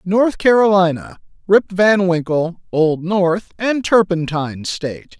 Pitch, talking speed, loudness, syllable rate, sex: 185 Hz, 115 wpm, -16 LUFS, 3.8 syllables/s, male